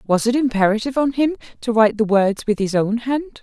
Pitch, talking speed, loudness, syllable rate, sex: 235 Hz, 230 wpm, -19 LUFS, 5.8 syllables/s, female